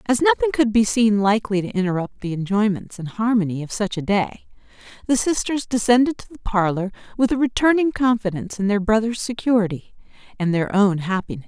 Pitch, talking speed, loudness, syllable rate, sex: 215 Hz, 180 wpm, -20 LUFS, 5.8 syllables/s, female